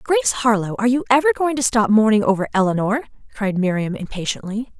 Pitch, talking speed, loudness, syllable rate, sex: 230 Hz, 175 wpm, -19 LUFS, 6.4 syllables/s, female